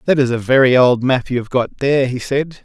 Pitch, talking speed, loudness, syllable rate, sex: 130 Hz, 275 wpm, -15 LUFS, 5.8 syllables/s, male